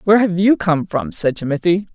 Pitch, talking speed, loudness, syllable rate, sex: 180 Hz, 215 wpm, -17 LUFS, 5.6 syllables/s, female